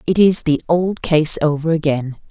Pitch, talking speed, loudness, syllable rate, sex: 160 Hz, 180 wpm, -16 LUFS, 4.5 syllables/s, female